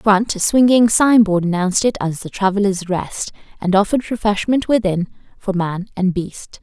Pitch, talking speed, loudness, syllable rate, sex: 200 Hz, 180 wpm, -17 LUFS, 5.1 syllables/s, female